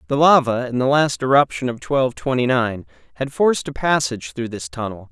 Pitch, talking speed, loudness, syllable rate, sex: 130 Hz, 200 wpm, -19 LUFS, 5.8 syllables/s, male